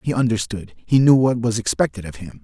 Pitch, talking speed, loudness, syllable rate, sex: 115 Hz, 220 wpm, -19 LUFS, 5.8 syllables/s, male